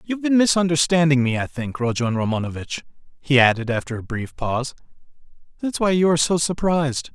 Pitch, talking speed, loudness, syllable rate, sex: 145 Hz, 170 wpm, -20 LUFS, 6.0 syllables/s, male